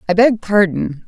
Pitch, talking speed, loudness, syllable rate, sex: 200 Hz, 165 wpm, -15 LUFS, 4.5 syllables/s, female